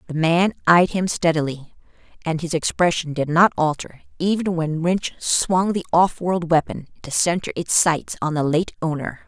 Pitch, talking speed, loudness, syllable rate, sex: 165 Hz, 175 wpm, -20 LUFS, 4.6 syllables/s, female